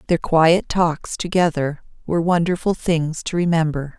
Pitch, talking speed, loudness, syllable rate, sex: 165 Hz, 135 wpm, -19 LUFS, 4.5 syllables/s, female